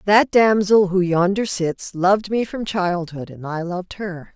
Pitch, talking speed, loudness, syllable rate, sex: 190 Hz, 180 wpm, -19 LUFS, 4.3 syllables/s, female